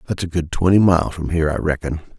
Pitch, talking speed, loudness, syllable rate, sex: 85 Hz, 245 wpm, -19 LUFS, 7.0 syllables/s, male